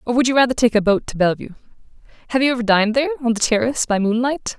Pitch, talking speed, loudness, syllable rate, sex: 235 Hz, 250 wpm, -18 LUFS, 7.9 syllables/s, female